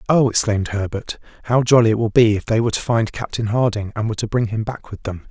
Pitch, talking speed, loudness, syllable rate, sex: 110 Hz, 260 wpm, -19 LUFS, 6.5 syllables/s, male